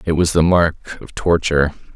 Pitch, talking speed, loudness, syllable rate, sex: 80 Hz, 155 wpm, -17 LUFS, 5.6 syllables/s, male